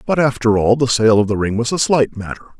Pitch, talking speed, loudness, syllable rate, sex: 120 Hz, 275 wpm, -15 LUFS, 6.1 syllables/s, male